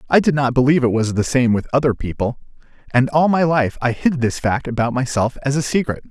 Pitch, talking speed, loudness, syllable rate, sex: 130 Hz, 235 wpm, -18 LUFS, 5.9 syllables/s, male